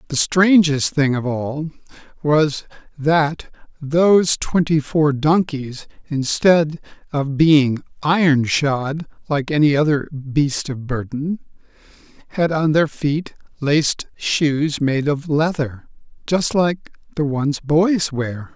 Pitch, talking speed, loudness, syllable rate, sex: 150 Hz, 120 wpm, -18 LUFS, 3.4 syllables/s, male